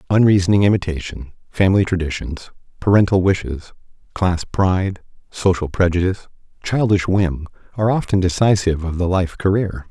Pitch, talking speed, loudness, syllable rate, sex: 95 Hz, 115 wpm, -18 LUFS, 5.5 syllables/s, male